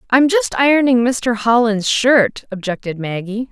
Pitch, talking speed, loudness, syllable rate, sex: 225 Hz, 135 wpm, -15 LUFS, 4.3 syllables/s, female